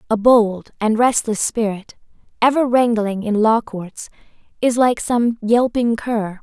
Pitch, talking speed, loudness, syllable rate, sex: 225 Hz, 140 wpm, -17 LUFS, 3.9 syllables/s, female